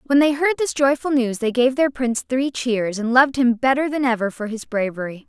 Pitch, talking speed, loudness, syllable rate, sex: 255 Hz, 240 wpm, -20 LUFS, 5.5 syllables/s, female